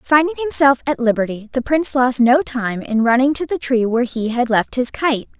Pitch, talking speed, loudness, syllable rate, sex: 260 Hz, 225 wpm, -17 LUFS, 5.3 syllables/s, female